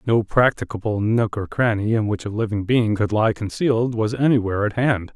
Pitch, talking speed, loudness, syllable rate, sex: 110 Hz, 200 wpm, -20 LUFS, 5.4 syllables/s, male